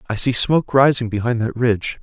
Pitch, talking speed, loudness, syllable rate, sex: 120 Hz, 205 wpm, -17 LUFS, 6.0 syllables/s, male